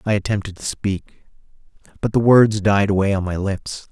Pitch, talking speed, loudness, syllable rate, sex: 100 Hz, 185 wpm, -19 LUFS, 5.0 syllables/s, male